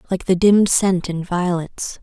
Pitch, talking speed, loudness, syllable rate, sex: 180 Hz, 180 wpm, -18 LUFS, 3.9 syllables/s, female